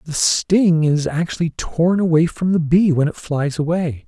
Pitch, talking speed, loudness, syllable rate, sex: 165 Hz, 190 wpm, -17 LUFS, 4.4 syllables/s, male